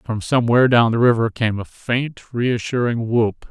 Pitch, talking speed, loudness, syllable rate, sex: 120 Hz, 190 wpm, -18 LUFS, 5.0 syllables/s, male